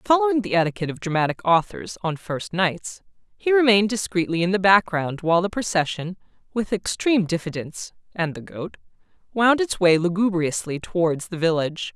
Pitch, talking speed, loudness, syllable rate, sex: 180 Hz, 155 wpm, -22 LUFS, 5.6 syllables/s, male